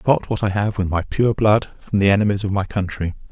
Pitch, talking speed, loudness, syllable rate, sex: 100 Hz, 270 wpm, -20 LUFS, 5.9 syllables/s, male